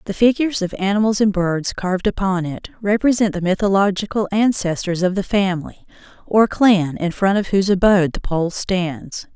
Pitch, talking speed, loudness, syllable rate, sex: 195 Hz, 165 wpm, -18 LUFS, 5.2 syllables/s, female